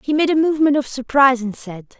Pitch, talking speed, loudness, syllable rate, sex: 270 Hz, 240 wpm, -17 LUFS, 6.4 syllables/s, female